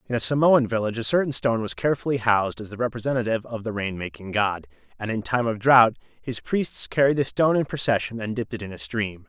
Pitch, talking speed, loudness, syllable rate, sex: 115 Hz, 235 wpm, -23 LUFS, 6.6 syllables/s, male